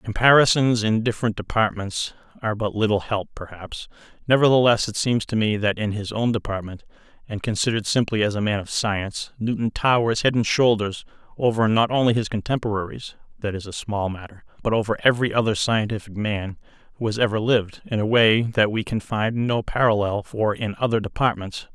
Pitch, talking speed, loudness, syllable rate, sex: 110 Hz, 175 wpm, -22 LUFS, 5.6 syllables/s, male